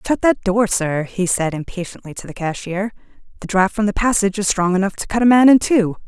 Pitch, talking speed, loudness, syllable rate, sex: 200 Hz, 235 wpm, -17 LUFS, 5.8 syllables/s, female